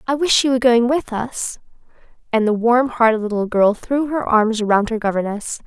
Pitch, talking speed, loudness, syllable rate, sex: 235 Hz, 200 wpm, -18 LUFS, 5.3 syllables/s, female